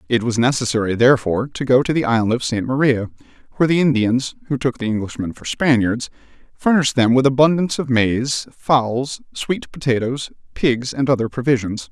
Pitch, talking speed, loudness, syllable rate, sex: 125 Hz, 170 wpm, -18 LUFS, 5.6 syllables/s, male